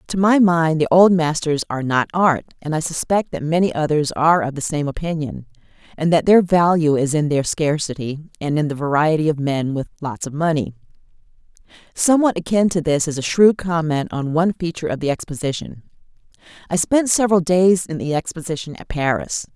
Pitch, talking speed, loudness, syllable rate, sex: 160 Hz, 185 wpm, -18 LUFS, 5.6 syllables/s, female